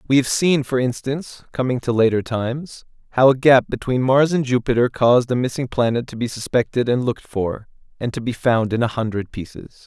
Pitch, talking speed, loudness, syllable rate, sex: 125 Hz, 205 wpm, -19 LUFS, 5.1 syllables/s, male